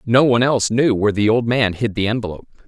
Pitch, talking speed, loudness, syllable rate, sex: 115 Hz, 245 wpm, -17 LUFS, 7.1 syllables/s, male